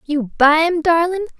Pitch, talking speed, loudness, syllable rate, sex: 325 Hz, 170 wpm, -15 LUFS, 4.6 syllables/s, female